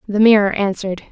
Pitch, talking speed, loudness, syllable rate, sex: 205 Hz, 160 wpm, -15 LUFS, 6.6 syllables/s, female